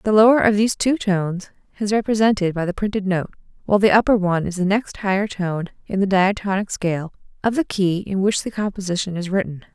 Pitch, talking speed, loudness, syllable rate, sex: 195 Hz, 210 wpm, -20 LUFS, 6.1 syllables/s, female